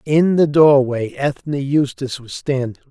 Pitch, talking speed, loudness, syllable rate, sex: 140 Hz, 145 wpm, -17 LUFS, 4.4 syllables/s, male